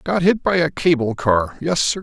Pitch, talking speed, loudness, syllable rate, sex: 155 Hz, 235 wpm, -18 LUFS, 4.6 syllables/s, male